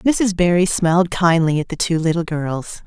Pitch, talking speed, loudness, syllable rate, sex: 170 Hz, 190 wpm, -18 LUFS, 4.7 syllables/s, female